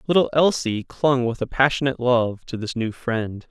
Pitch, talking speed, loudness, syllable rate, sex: 125 Hz, 190 wpm, -22 LUFS, 4.8 syllables/s, male